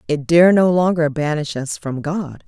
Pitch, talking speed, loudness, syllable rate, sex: 160 Hz, 195 wpm, -17 LUFS, 4.4 syllables/s, female